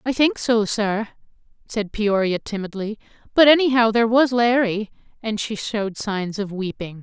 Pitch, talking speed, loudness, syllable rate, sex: 220 Hz, 155 wpm, -20 LUFS, 4.7 syllables/s, female